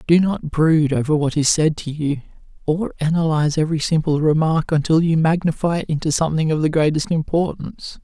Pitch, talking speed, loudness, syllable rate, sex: 155 Hz, 180 wpm, -19 LUFS, 5.7 syllables/s, male